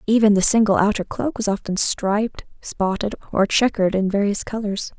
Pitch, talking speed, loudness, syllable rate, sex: 205 Hz, 170 wpm, -20 LUFS, 5.3 syllables/s, female